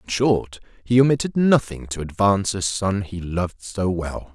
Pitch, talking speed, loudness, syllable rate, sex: 100 Hz, 180 wpm, -21 LUFS, 4.7 syllables/s, male